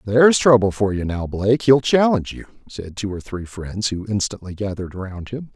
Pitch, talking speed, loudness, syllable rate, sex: 105 Hz, 205 wpm, -19 LUFS, 5.6 syllables/s, male